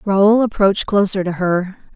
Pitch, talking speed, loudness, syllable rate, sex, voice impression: 195 Hz, 155 wpm, -16 LUFS, 4.7 syllables/s, female, feminine, slightly gender-neutral, middle-aged, slightly thin, slightly tensed, slightly weak, slightly dark, soft, slightly muffled, fluent, cool, very intellectual, refreshing, very sincere, calm, friendly, reassuring, slightly unique, slightly elegant, slightly wild, sweet, lively, kind, modest